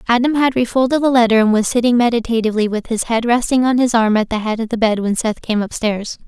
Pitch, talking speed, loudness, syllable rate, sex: 230 Hz, 250 wpm, -16 LUFS, 6.3 syllables/s, female